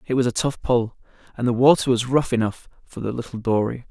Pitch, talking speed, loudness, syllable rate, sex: 120 Hz, 230 wpm, -21 LUFS, 5.9 syllables/s, male